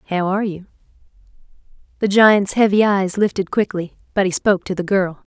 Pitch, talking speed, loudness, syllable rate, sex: 195 Hz, 170 wpm, -18 LUFS, 5.7 syllables/s, female